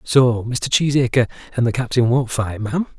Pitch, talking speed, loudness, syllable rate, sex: 120 Hz, 180 wpm, -19 LUFS, 5.2 syllables/s, male